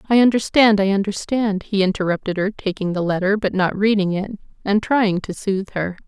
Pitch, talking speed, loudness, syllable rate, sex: 200 Hz, 190 wpm, -19 LUFS, 5.5 syllables/s, female